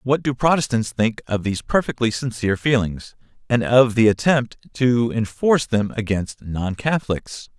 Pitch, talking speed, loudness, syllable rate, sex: 115 Hz, 150 wpm, -20 LUFS, 4.8 syllables/s, male